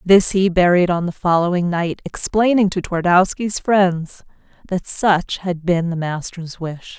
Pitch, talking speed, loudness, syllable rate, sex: 180 Hz, 155 wpm, -18 LUFS, 4.1 syllables/s, female